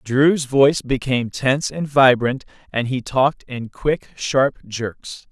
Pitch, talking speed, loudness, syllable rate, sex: 130 Hz, 145 wpm, -19 LUFS, 4.1 syllables/s, male